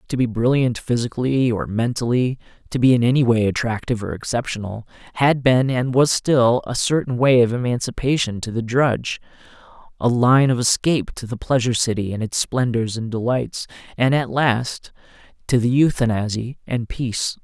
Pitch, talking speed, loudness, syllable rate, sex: 120 Hz, 165 wpm, -20 LUFS, 5.3 syllables/s, male